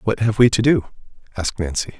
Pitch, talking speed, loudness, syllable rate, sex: 110 Hz, 210 wpm, -19 LUFS, 6.2 syllables/s, male